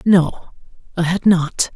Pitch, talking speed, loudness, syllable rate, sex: 175 Hz, 135 wpm, -17 LUFS, 3.7 syllables/s, female